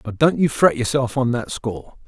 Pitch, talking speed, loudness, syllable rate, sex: 125 Hz, 230 wpm, -19 LUFS, 5.2 syllables/s, male